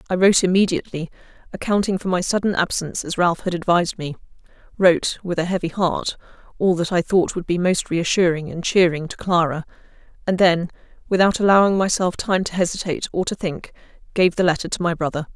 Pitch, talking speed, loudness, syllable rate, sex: 180 Hz, 180 wpm, -20 LUFS, 6.1 syllables/s, female